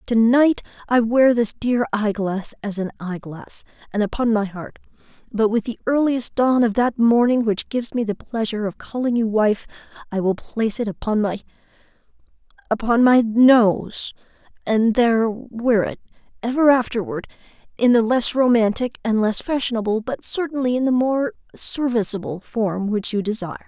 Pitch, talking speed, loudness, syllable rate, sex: 225 Hz, 160 wpm, -20 LUFS, 4.9 syllables/s, female